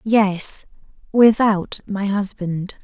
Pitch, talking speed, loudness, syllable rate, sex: 200 Hz, 85 wpm, -19 LUFS, 2.7 syllables/s, female